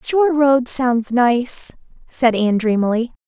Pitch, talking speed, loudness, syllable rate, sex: 250 Hz, 130 wpm, -17 LUFS, 4.0 syllables/s, female